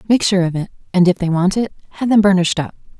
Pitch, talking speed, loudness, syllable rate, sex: 190 Hz, 260 wpm, -16 LUFS, 7.1 syllables/s, female